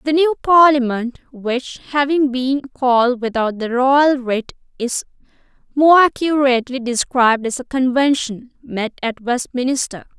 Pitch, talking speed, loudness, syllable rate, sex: 260 Hz, 125 wpm, -17 LUFS, 4.3 syllables/s, female